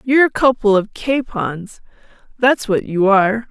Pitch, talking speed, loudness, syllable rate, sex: 220 Hz, 155 wpm, -16 LUFS, 4.6 syllables/s, female